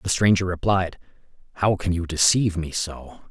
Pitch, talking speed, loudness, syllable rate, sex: 90 Hz, 165 wpm, -22 LUFS, 5.2 syllables/s, male